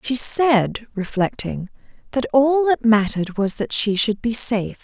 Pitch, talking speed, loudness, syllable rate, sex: 230 Hz, 160 wpm, -19 LUFS, 4.4 syllables/s, female